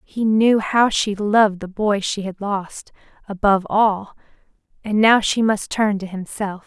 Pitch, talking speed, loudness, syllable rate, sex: 205 Hz, 170 wpm, -19 LUFS, 4.1 syllables/s, female